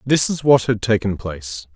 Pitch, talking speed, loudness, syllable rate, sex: 105 Hz, 205 wpm, -18 LUFS, 5.1 syllables/s, male